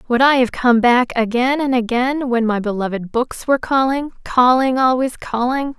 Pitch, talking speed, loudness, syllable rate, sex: 250 Hz, 175 wpm, -17 LUFS, 4.8 syllables/s, female